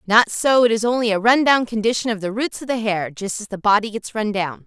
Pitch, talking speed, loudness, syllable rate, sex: 220 Hz, 270 wpm, -19 LUFS, 5.7 syllables/s, female